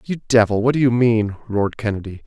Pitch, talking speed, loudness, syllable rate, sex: 115 Hz, 210 wpm, -18 LUFS, 5.9 syllables/s, male